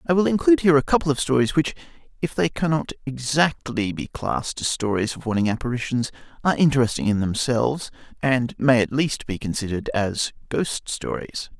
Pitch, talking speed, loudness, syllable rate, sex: 135 Hz, 170 wpm, -22 LUFS, 5.7 syllables/s, male